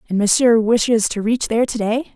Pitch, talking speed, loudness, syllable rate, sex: 225 Hz, 220 wpm, -17 LUFS, 5.9 syllables/s, female